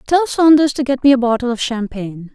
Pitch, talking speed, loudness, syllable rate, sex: 255 Hz, 230 wpm, -15 LUFS, 5.9 syllables/s, female